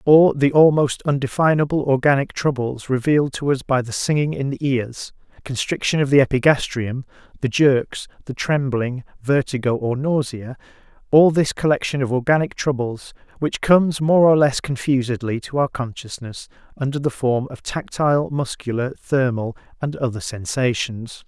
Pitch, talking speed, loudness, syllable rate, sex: 135 Hz, 140 wpm, -20 LUFS, 4.9 syllables/s, male